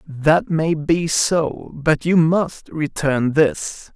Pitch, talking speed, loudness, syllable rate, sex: 155 Hz, 135 wpm, -18 LUFS, 2.6 syllables/s, male